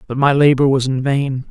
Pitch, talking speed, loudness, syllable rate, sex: 135 Hz, 240 wpm, -15 LUFS, 5.3 syllables/s, female